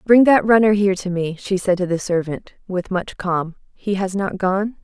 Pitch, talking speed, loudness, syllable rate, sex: 190 Hz, 225 wpm, -19 LUFS, 4.8 syllables/s, female